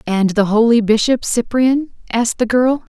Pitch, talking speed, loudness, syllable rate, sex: 235 Hz, 165 wpm, -15 LUFS, 4.6 syllables/s, female